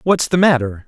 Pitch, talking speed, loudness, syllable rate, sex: 150 Hz, 205 wpm, -15 LUFS, 5.2 syllables/s, male